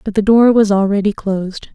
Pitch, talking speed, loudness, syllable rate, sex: 205 Hz, 205 wpm, -13 LUFS, 5.6 syllables/s, female